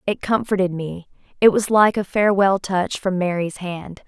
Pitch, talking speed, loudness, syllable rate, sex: 190 Hz, 160 wpm, -19 LUFS, 4.7 syllables/s, female